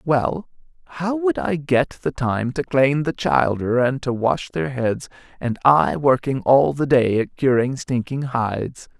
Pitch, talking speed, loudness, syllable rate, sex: 125 Hz, 165 wpm, -20 LUFS, 4.1 syllables/s, male